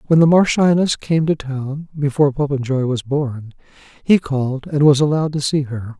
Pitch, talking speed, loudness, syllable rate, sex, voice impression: 145 Hz, 160 wpm, -17 LUFS, 5.2 syllables/s, male, masculine, slightly old, soft, slightly refreshing, sincere, calm, elegant, slightly kind